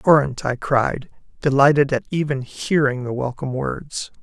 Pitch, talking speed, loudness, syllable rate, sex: 135 Hz, 155 wpm, -20 LUFS, 4.8 syllables/s, male